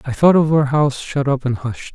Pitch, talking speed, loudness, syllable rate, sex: 140 Hz, 275 wpm, -17 LUFS, 5.5 syllables/s, male